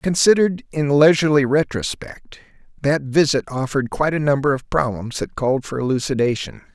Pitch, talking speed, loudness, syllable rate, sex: 140 Hz, 140 wpm, -19 LUFS, 5.8 syllables/s, male